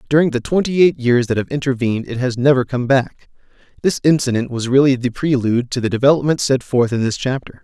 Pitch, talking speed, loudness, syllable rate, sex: 130 Hz, 210 wpm, -17 LUFS, 6.1 syllables/s, male